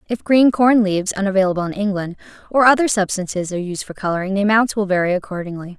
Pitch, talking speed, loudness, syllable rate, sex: 200 Hz, 195 wpm, -18 LUFS, 5.9 syllables/s, female